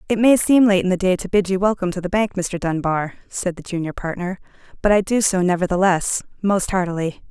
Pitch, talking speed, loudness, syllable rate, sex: 190 Hz, 215 wpm, -19 LUFS, 5.9 syllables/s, female